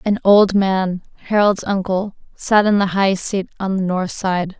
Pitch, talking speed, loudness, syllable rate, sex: 195 Hz, 185 wpm, -17 LUFS, 4.1 syllables/s, female